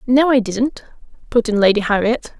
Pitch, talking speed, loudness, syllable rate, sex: 235 Hz, 175 wpm, -17 LUFS, 5.0 syllables/s, female